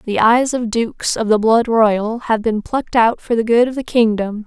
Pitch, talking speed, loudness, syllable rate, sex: 225 Hz, 240 wpm, -16 LUFS, 4.7 syllables/s, female